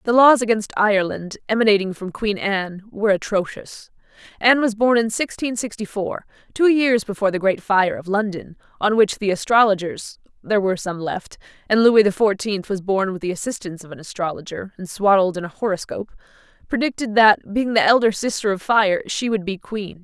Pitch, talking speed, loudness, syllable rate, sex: 205 Hz, 185 wpm, -19 LUFS, 4.6 syllables/s, female